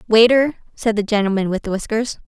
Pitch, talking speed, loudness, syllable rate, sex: 220 Hz, 185 wpm, -18 LUFS, 6.0 syllables/s, female